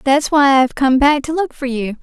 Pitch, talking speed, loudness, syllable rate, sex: 275 Hz, 265 wpm, -15 LUFS, 5.3 syllables/s, female